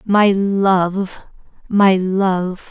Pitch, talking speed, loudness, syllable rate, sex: 190 Hz, 90 wpm, -16 LUFS, 1.8 syllables/s, female